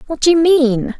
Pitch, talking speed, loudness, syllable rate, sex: 295 Hz, 240 wpm, -13 LUFS, 4.9 syllables/s, female